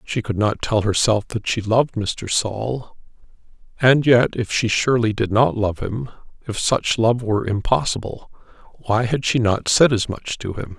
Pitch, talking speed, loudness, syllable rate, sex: 110 Hz, 170 wpm, -20 LUFS, 4.7 syllables/s, male